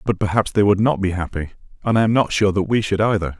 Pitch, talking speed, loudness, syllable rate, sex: 100 Hz, 285 wpm, -19 LUFS, 6.6 syllables/s, male